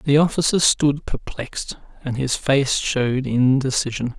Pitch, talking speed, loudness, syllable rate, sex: 135 Hz, 130 wpm, -20 LUFS, 4.3 syllables/s, male